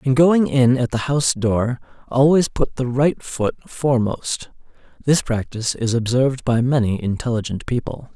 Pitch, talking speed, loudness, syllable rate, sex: 125 Hz, 155 wpm, -19 LUFS, 4.7 syllables/s, male